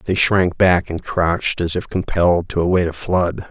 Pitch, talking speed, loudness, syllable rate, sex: 90 Hz, 205 wpm, -18 LUFS, 4.8 syllables/s, male